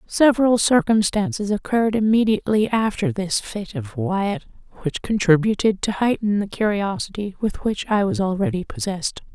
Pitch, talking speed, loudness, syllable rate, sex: 205 Hz, 135 wpm, -21 LUFS, 5.1 syllables/s, female